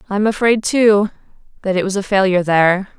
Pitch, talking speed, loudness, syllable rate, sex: 200 Hz, 180 wpm, -15 LUFS, 6.0 syllables/s, female